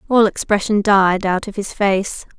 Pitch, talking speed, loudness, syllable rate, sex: 200 Hz, 175 wpm, -17 LUFS, 4.3 syllables/s, female